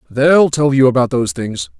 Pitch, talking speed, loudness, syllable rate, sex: 130 Hz, 200 wpm, -14 LUFS, 5.2 syllables/s, male